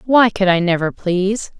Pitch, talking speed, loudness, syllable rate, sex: 195 Hz, 190 wpm, -16 LUFS, 4.9 syllables/s, female